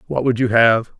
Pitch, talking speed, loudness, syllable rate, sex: 120 Hz, 240 wpm, -16 LUFS, 5.3 syllables/s, male